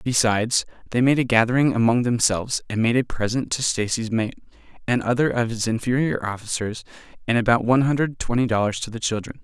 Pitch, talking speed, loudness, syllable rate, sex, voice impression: 120 Hz, 185 wpm, -22 LUFS, 6.0 syllables/s, male, masculine, adult-like, tensed, powerful, bright, slightly raspy, cool, intellectual, calm, friendly, wild, lively